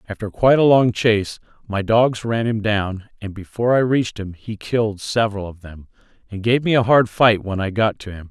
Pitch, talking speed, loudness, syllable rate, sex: 110 Hz, 225 wpm, -18 LUFS, 5.4 syllables/s, male